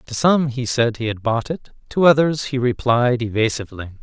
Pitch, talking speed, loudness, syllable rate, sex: 125 Hz, 195 wpm, -19 LUFS, 5.0 syllables/s, male